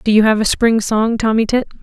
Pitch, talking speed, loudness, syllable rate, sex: 220 Hz, 265 wpm, -15 LUFS, 5.7 syllables/s, female